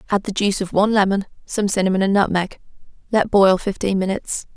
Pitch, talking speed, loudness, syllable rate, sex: 195 Hz, 185 wpm, -19 LUFS, 6.4 syllables/s, female